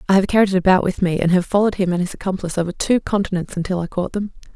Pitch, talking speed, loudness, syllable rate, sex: 185 Hz, 275 wpm, -19 LUFS, 7.7 syllables/s, female